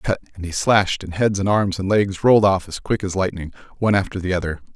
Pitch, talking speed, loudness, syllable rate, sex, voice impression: 95 Hz, 265 wpm, -20 LUFS, 6.7 syllables/s, male, masculine, adult-like, thick, tensed, hard, fluent, cool, sincere, calm, reassuring, slightly wild, kind, modest